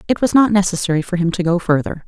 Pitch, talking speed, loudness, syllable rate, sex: 185 Hz, 260 wpm, -16 LUFS, 6.9 syllables/s, female